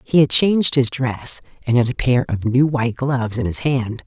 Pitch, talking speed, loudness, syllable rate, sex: 130 Hz, 235 wpm, -18 LUFS, 5.1 syllables/s, female